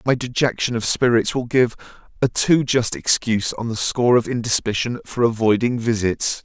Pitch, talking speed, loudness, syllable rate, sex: 115 Hz, 170 wpm, -19 LUFS, 5.3 syllables/s, male